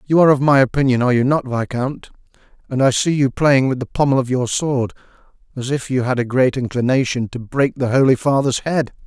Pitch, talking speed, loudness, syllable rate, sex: 130 Hz, 220 wpm, -17 LUFS, 5.8 syllables/s, male